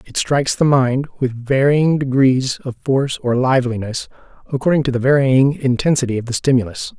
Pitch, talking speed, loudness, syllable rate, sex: 130 Hz, 165 wpm, -17 LUFS, 5.4 syllables/s, male